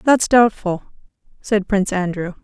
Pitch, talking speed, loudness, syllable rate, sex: 200 Hz, 150 wpm, -18 LUFS, 5.1 syllables/s, female